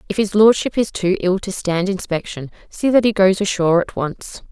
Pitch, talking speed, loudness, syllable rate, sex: 190 Hz, 215 wpm, -17 LUFS, 5.2 syllables/s, female